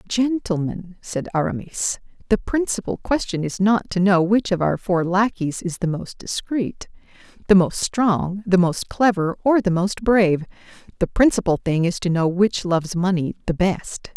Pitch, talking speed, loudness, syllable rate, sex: 190 Hz, 170 wpm, -21 LUFS, 4.5 syllables/s, female